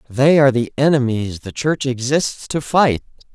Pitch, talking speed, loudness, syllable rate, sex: 130 Hz, 160 wpm, -17 LUFS, 4.6 syllables/s, male